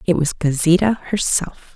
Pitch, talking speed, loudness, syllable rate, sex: 170 Hz, 135 wpm, -18 LUFS, 4.3 syllables/s, female